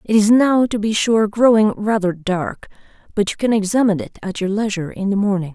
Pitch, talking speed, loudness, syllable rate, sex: 205 Hz, 205 wpm, -17 LUFS, 5.7 syllables/s, female